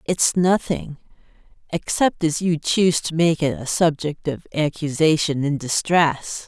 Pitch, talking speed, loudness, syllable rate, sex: 155 Hz, 130 wpm, -20 LUFS, 4.2 syllables/s, female